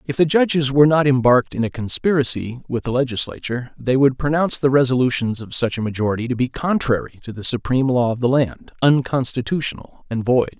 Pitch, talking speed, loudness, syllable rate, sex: 130 Hz, 195 wpm, -19 LUFS, 6.1 syllables/s, male